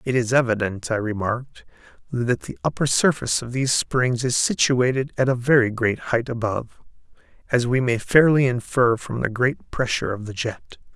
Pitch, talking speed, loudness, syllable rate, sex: 120 Hz, 170 wpm, -21 LUFS, 5.2 syllables/s, male